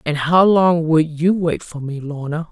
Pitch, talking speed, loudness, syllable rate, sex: 160 Hz, 215 wpm, -17 LUFS, 4.2 syllables/s, female